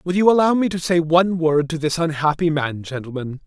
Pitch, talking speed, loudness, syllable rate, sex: 160 Hz, 225 wpm, -19 LUFS, 5.7 syllables/s, male